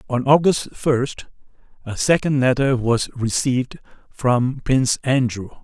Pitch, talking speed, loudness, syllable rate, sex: 130 Hz, 115 wpm, -19 LUFS, 4.1 syllables/s, male